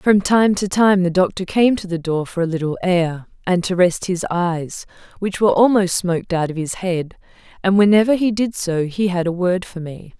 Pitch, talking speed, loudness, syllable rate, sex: 185 Hz, 225 wpm, -18 LUFS, 5.0 syllables/s, female